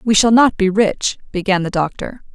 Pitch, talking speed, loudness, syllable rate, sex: 205 Hz, 205 wpm, -16 LUFS, 4.9 syllables/s, female